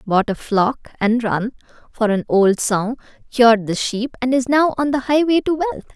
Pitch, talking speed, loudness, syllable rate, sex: 245 Hz, 200 wpm, -18 LUFS, 4.7 syllables/s, female